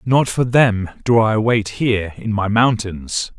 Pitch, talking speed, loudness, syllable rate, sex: 110 Hz, 175 wpm, -17 LUFS, 3.9 syllables/s, male